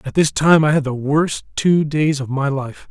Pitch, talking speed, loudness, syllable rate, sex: 145 Hz, 250 wpm, -17 LUFS, 4.4 syllables/s, male